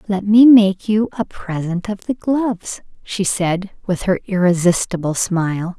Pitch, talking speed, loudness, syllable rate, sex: 195 Hz, 155 wpm, -17 LUFS, 4.3 syllables/s, female